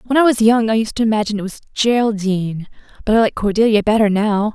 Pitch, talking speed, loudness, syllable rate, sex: 215 Hz, 225 wpm, -16 LUFS, 6.7 syllables/s, female